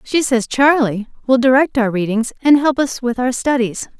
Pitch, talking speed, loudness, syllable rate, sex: 250 Hz, 195 wpm, -16 LUFS, 4.8 syllables/s, female